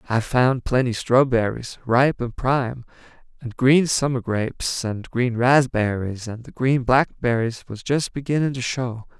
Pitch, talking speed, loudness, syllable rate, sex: 125 Hz, 150 wpm, -21 LUFS, 4.3 syllables/s, male